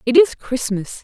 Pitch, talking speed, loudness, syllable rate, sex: 250 Hz, 175 wpm, -18 LUFS, 5.5 syllables/s, female